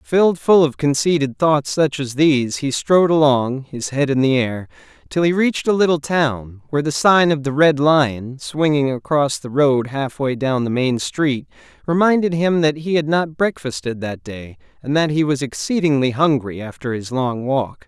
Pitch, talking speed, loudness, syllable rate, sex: 140 Hz, 190 wpm, -18 LUFS, 4.7 syllables/s, male